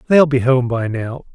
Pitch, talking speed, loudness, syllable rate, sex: 130 Hz, 225 wpm, -16 LUFS, 4.6 syllables/s, male